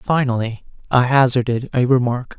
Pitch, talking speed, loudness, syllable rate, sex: 130 Hz, 125 wpm, -18 LUFS, 4.9 syllables/s, female